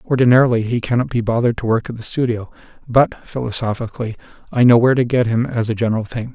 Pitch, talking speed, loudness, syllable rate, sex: 120 Hz, 190 wpm, -17 LUFS, 6.9 syllables/s, male